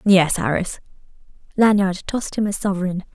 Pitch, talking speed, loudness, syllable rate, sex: 190 Hz, 135 wpm, -20 LUFS, 5.7 syllables/s, female